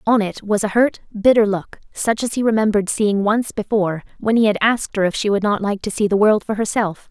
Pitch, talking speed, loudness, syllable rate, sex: 210 Hz, 255 wpm, -18 LUFS, 5.8 syllables/s, female